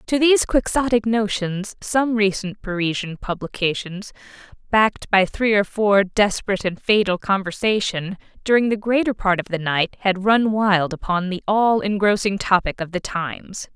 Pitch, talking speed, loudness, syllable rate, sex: 200 Hz, 150 wpm, -20 LUFS, 4.8 syllables/s, female